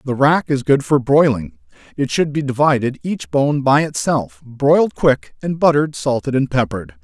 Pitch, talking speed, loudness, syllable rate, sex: 135 Hz, 170 wpm, -17 LUFS, 4.9 syllables/s, male